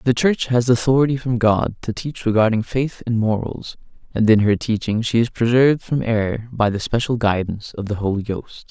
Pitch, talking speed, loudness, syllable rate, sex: 115 Hz, 200 wpm, -19 LUFS, 5.3 syllables/s, male